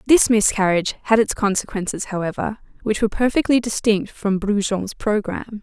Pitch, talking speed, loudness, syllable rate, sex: 210 Hz, 140 wpm, -20 LUFS, 5.5 syllables/s, female